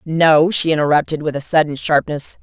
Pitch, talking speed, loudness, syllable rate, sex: 155 Hz, 175 wpm, -16 LUFS, 5.2 syllables/s, female